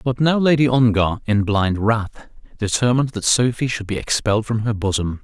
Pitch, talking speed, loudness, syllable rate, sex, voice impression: 115 Hz, 185 wpm, -19 LUFS, 5.2 syllables/s, male, very masculine, very middle-aged, tensed, very powerful, bright, slightly soft, slightly muffled, fluent, slightly raspy, cool, very intellectual, refreshing, slightly sincere, calm, mature, very friendly, very reassuring, unique, slightly elegant, slightly wild, sweet, lively, kind, slightly intense, slightly modest